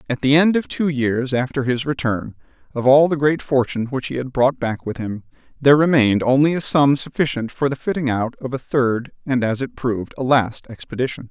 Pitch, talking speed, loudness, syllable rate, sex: 130 Hz, 220 wpm, -19 LUFS, 5.5 syllables/s, male